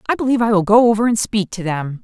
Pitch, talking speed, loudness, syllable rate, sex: 210 Hz, 295 wpm, -16 LUFS, 6.8 syllables/s, female